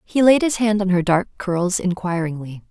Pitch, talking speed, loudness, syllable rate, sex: 190 Hz, 200 wpm, -19 LUFS, 4.7 syllables/s, female